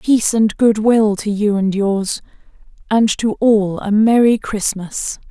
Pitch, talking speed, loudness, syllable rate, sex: 210 Hz, 160 wpm, -16 LUFS, 3.9 syllables/s, female